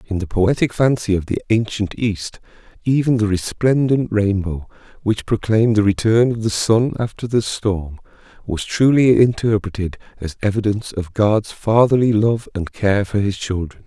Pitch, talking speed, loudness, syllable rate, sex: 105 Hz, 155 wpm, -18 LUFS, 4.7 syllables/s, male